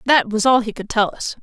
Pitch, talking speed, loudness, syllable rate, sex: 230 Hz, 295 wpm, -18 LUFS, 5.8 syllables/s, female